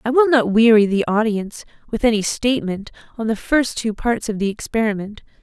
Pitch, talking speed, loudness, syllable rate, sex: 225 Hz, 190 wpm, -18 LUFS, 5.6 syllables/s, female